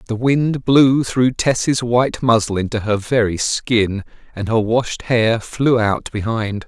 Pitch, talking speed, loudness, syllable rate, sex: 115 Hz, 160 wpm, -17 LUFS, 3.6 syllables/s, male